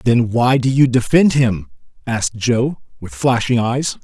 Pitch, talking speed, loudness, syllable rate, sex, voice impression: 120 Hz, 165 wpm, -16 LUFS, 4.2 syllables/s, male, masculine, adult-like, slightly thick, cool, sincere